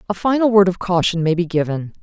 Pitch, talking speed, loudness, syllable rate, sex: 185 Hz, 240 wpm, -17 LUFS, 6.2 syllables/s, female